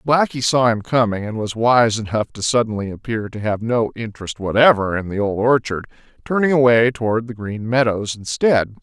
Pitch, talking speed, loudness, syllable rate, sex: 115 Hz, 185 wpm, -18 LUFS, 5.3 syllables/s, male